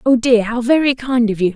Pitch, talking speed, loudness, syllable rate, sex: 240 Hz, 270 wpm, -15 LUFS, 5.6 syllables/s, female